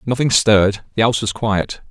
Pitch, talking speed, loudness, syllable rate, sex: 110 Hz, 155 wpm, -16 LUFS, 5.6 syllables/s, male